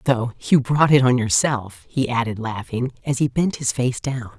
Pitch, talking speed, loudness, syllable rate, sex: 125 Hz, 205 wpm, -20 LUFS, 4.6 syllables/s, female